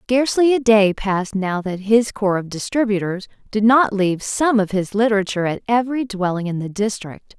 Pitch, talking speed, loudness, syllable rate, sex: 210 Hz, 185 wpm, -19 LUFS, 5.4 syllables/s, female